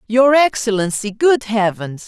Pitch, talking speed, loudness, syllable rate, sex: 225 Hz, 115 wpm, -16 LUFS, 4.2 syllables/s, female